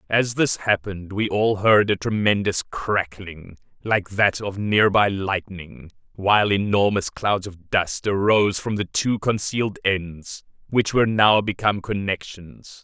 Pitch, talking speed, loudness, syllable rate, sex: 100 Hz, 140 wpm, -21 LUFS, 4.1 syllables/s, male